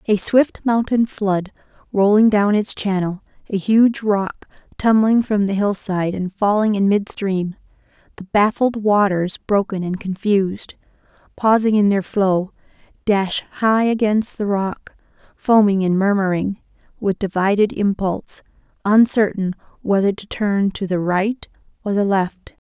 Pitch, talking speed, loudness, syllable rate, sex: 200 Hz, 140 wpm, -18 LUFS, 4.1 syllables/s, female